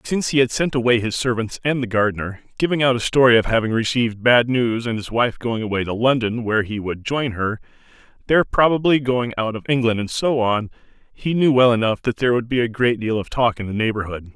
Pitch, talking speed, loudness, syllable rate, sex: 120 Hz, 235 wpm, -19 LUFS, 5.9 syllables/s, male